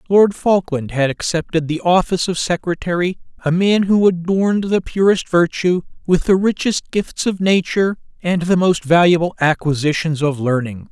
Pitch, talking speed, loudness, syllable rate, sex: 175 Hz, 155 wpm, -17 LUFS, 4.9 syllables/s, male